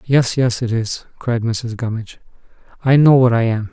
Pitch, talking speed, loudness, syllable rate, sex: 120 Hz, 195 wpm, -17 LUFS, 4.9 syllables/s, male